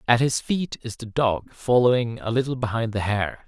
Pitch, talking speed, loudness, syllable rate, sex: 120 Hz, 205 wpm, -23 LUFS, 4.9 syllables/s, male